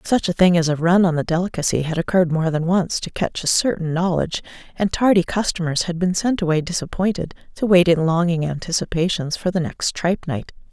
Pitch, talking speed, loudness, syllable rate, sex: 175 Hz, 200 wpm, -20 LUFS, 5.8 syllables/s, female